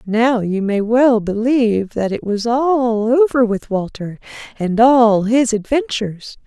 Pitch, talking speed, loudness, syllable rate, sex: 230 Hz, 150 wpm, -16 LUFS, 3.9 syllables/s, female